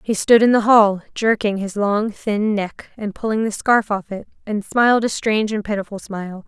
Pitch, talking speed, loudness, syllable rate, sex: 210 Hz, 215 wpm, -18 LUFS, 5.0 syllables/s, female